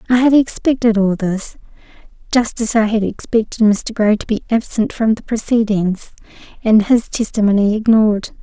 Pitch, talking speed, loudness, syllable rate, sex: 220 Hz, 155 wpm, -15 LUFS, 5.0 syllables/s, female